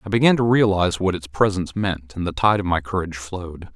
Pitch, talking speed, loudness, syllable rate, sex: 95 Hz, 240 wpm, -21 LUFS, 6.4 syllables/s, male